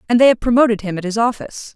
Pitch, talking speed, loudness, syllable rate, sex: 225 Hz, 275 wpm, -16 LUFS, 7.6 syllables/s, female